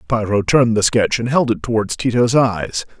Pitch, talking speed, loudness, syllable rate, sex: 115 Hz, 200 wpm, -16 LUFS, 5.1 syllables/s, male